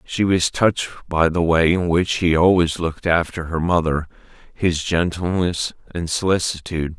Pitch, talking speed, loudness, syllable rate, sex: 85 Hz, 155 wpm, -19 LUFS, 4.8 syllables/s, male